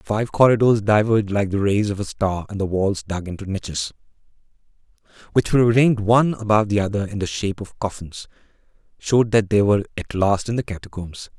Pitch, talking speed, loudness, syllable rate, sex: 105 Hz, 190 wpm, -20 LUFS, 6.2 syllables/s, male